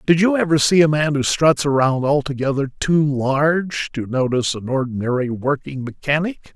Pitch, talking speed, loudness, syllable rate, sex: 145 Hz, 165 wpm, -19 LUFS, 5.0 syllables/s, male